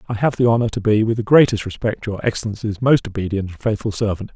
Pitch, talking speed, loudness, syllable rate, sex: 110 Hz, 235 wpm, -19 LUFS, 6.5 syllables/s, male